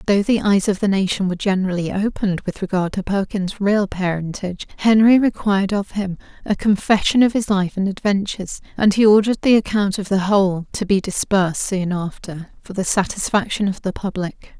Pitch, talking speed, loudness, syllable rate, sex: 195 Hz, 185 wpm, -19 LUFS, 5.6 syllables/s, female